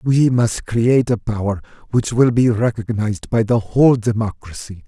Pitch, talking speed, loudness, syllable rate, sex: 115 Hz, 160 wpm, -17 LUFS, 4.9 syllables/s, male